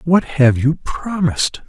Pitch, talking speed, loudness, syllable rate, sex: 150 Hz, 145 wpm, -17 LUFS, 3.9 syllables/s, male